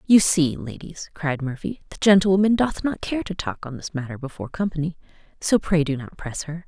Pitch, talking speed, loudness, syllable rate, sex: 165 Hz, 215 wpm, -23 LUFS, 5.5 syllables/s, female